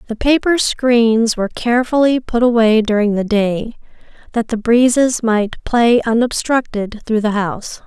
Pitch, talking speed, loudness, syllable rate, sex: 230 Hz, 145 wpm, -15 LUFS, 4.5 syllables/s, female